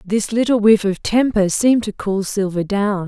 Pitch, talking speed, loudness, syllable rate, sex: 210 Hz, 195 wpm, -17 LUFS, 4.6 syllables/s, female